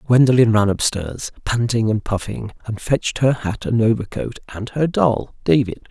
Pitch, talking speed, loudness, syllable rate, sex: 115 Hz, 165 wpm, -19 LUFS, 4.7 syllables/s, male